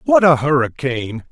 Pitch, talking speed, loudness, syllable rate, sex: 135 Hz, 135 wpm, -16 LUFS, 5.1 syllables/s, male